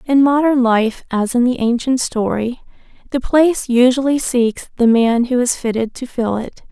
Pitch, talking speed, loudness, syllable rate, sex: 245 Hz, 180 wpm, -16 LUFS, 4.6 syllables/s, female